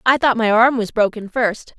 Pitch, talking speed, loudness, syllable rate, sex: 230 Hz, 235 wpm, -17 LUFS, 4.8 syllables/s, female